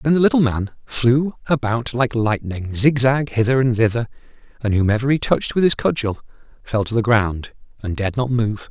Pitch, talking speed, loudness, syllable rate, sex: 120 Hz, 195 wpm, -19 LUFS, 5.3 syllables/s, male